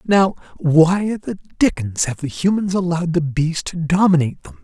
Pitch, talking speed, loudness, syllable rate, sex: 170 Hz, 170 wpm, -18 LUFS, 4.9 syllables/s, male